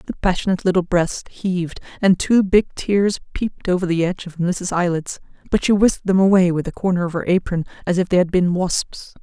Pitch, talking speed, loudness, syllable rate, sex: 180 Hz, 215 wpm, -19 LUFS, 5.7 syllables/s, female